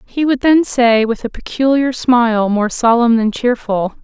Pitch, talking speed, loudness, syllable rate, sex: 240 Hz, 180 wpm, -14 LUFS, 4.4 syllables/s, female